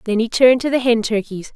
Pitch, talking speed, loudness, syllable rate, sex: 230 Hz, 270 wpm, -16 LUFS, 6.4 syllables/s, female